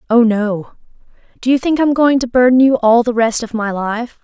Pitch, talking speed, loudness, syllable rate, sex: 240 Hz, 225 wpm, -14 LUFS, 5.1 syllables/s, female